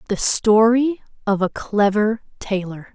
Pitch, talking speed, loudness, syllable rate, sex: 215 Hz, 120 wpm, -18 LUFS, 3.8 syllables/s, female